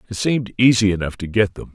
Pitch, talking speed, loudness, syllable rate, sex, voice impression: 105 Hz, 240 wpm, -18 LUFS, 6.6 syllables/s, male, very masculine, very adult-like, very middle-aged, very thick, tensed, powerful, slightly bright, slightly hard, slightly muffled, slightly fluent, cool, intellectual, sincere, calm, very mature, friendly, reassuring, slightly unique, very wild, slightly sweet, slightly lively, slightly strict, slightly sharp